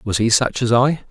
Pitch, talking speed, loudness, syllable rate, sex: 120 Hz, 270 wpm, -17 LUFS, 4.8 syllables/s, male